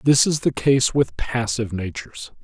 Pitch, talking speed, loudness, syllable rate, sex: 125 Hz, 175 wpm, -21 LUFS, 4.7 syllables/s, male